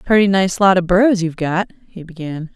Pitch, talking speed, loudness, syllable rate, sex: 180 Hz, 210 wpm, -16 LUFS, 5.7 syllables/s, female